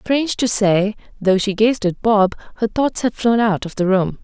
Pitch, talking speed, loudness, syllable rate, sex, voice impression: 210 Hz, 225 wpm, -18 LUFS, 4.6 syllables/s, female, feminine, slightly adult-like, soft, slightly muffled, friendly, reassuring